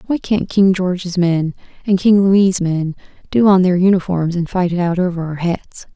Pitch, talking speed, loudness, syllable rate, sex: 180 Hz, 200 wpm, -16 LUFS, 4.7 syllables/s, female